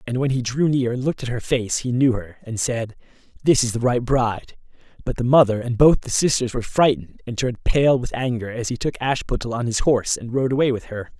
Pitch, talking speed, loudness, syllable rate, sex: 125 Hz, 245 wpm, -21 LUFS, 5.9 syllables/s, male